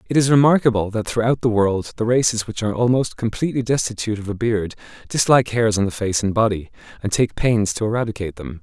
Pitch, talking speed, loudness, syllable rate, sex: 110 Hz, 210 wpm, -19 LUFS, 6.4 syllables/s, male